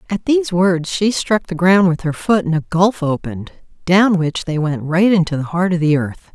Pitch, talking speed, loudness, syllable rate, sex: 175 Hz, 235 wpm, -16 LUFS, 5.1 syllables/s, female